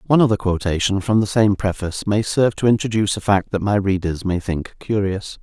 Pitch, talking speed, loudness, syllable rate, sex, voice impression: 100 Hz, 210 wpm, -19 LUFS, 6.0 syllables/s, male, masculine, middle-aged, tensed, powerful, slightly hard, clear, fluent, cool, intellectual, sincere, calm, reassuring, wild, lively, kind